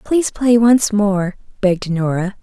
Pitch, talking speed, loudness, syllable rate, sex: 205 Hz, 150 wpm, -16 LUFS, 4.4 syllables/s, female